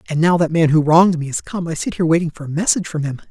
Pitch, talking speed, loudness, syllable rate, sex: 160 Hz, 325 wpm, -17 LUFS, 7.6 syllables/s, male